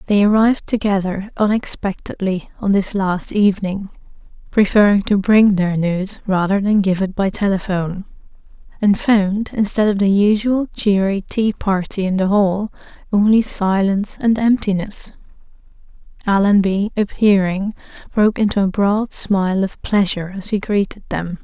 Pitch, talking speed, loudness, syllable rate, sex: 200 Hz, 135 wpm, -17 LUFS, 4.7 syllables/s, female